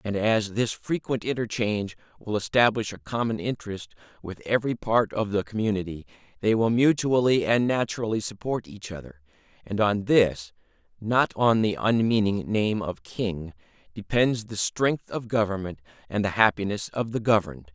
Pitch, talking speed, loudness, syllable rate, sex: 105 Hz, 150 wpm, -25 LUFS, 4.6 syllables/s, male